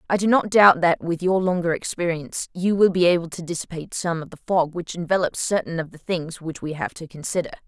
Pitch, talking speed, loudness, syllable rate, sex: 175 Hz, 235 wpm, -22 LUFS, 5.9 syllables/s, female